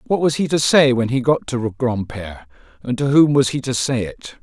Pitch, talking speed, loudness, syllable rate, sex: 125 Hz, 245 wpm, -18 LUFS, 5.2 syllables/s, male